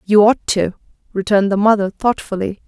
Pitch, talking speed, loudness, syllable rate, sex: 200 Hz, 155 wpm, -16 LUFS, 5.5 syllables/s, female